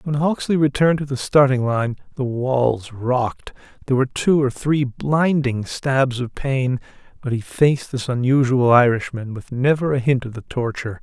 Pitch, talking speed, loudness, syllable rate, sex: 130 Hz, 175 wpm, -20 LUFS, 4.8 syllables/s, male